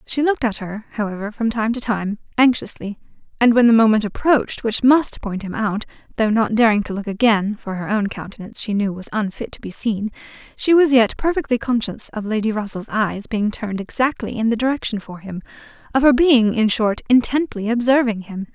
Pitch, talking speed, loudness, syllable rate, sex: 225 Hz, 195 wpm, -19 LUFS, 4.8 syllables/s, female